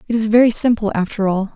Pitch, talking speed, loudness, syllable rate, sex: 215 Hz, 230 wpm, -16 LUFS, 6.5 syllables/s, female